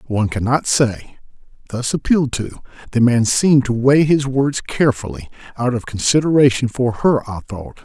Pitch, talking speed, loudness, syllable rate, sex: 125 Hz, 170 wpm, -17 LUFS, 5.2 syllables/s, male